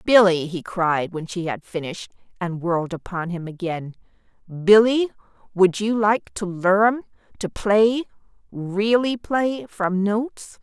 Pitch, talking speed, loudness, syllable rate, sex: 195 Hz, 130 wpm, -21 LUFS, 4.0 syllables/s, female